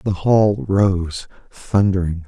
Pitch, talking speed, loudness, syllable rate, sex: 95 Hz, 105 wpm, -18 LUFS, 3.2 syllables/s, male